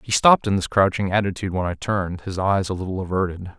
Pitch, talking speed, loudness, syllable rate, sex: 95 Hz, 235 wpm, -21 LUFS, 6.6 syllables/s, male